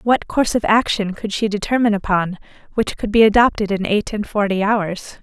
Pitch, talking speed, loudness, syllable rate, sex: 210 Hz, 195 wpm, -18 LUFS, 5.5 syllables/s, female